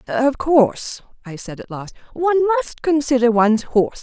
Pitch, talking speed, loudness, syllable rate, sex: 265 Hz, 165 wpm, -17 LUFS, 5.3 syllables/s, female